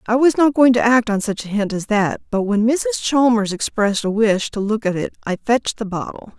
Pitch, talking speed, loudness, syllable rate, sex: 225 Hz, 255 wpm, -18 LUFS, 5.6 syllables/s, female